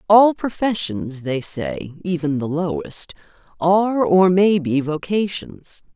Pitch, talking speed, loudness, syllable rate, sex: 180 Hz, 120 wpm, -19 LUFS, 3.7 syllables/s, female